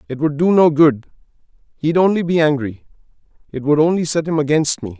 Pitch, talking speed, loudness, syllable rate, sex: 155 Hz, 190 wpm, -16 LUFS, 5.7 syllables/s, male